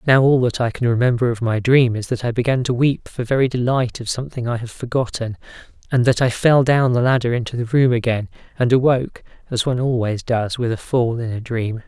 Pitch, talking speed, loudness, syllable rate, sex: 120 Hz, 230 wpm, -19 LUFS, 5.8 syllables/s, male